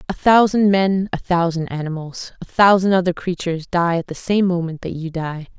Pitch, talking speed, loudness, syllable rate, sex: 175 Hz, 195 wpm, -18 LUFS, 5.2 syllables/s, female